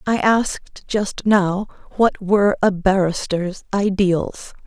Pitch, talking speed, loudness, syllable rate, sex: 195 Hz, 115 wpm, -19 LUFS, 3.5 syllables/s, female